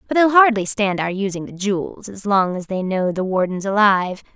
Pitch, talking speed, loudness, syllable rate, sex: 200 Hz, 220 wpm, -19 LUFS, 5.4 syllables/s, female